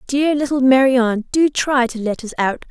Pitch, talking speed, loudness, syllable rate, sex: 255 Hz, 200 wpm, -17 LUFS, 4.9 syllables/s, female